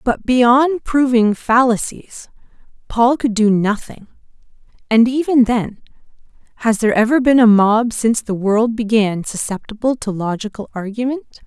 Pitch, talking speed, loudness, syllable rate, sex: 230 Hz, 125 wpm, -16 LUFS, 4.6 syllables/s, female